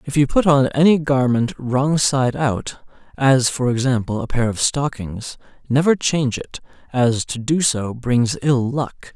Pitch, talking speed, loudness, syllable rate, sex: 130 Hz, 170 wpm, -19 LUFS, 4.1 syllables/s, male